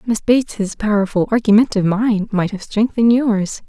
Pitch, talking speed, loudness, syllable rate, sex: 215 Hz, 145 wpm, -16 LUFS, 5.4 syllables/s, female